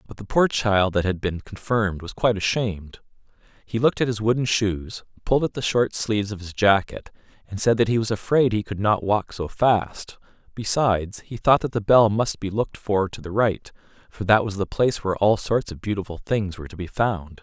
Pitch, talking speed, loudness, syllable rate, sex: 105 Hz, 225 wpm, -22 LUFS, 5.5 syllables/s, male